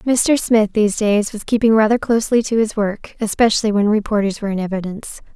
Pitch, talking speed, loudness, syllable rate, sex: 215 Hz, 190 wpm, -17 LUFS, 6.0 syllables/s, female